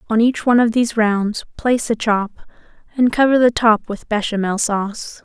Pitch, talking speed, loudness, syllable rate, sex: 225 Hz, 185 wpm, -17 LUFS, 5.4 syllables/s, female